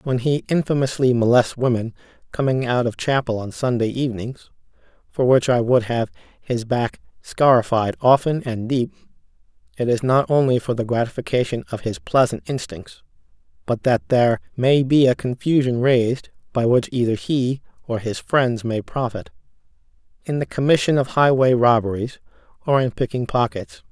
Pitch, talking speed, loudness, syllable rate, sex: 125 Hz, 155 wpm, -20 LUFS, 4.9 syllables/s, male